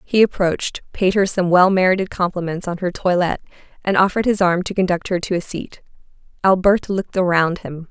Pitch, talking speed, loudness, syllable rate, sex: 185 Hz, 190 wpm, -18 LUFS, 5.7 syllables/s, female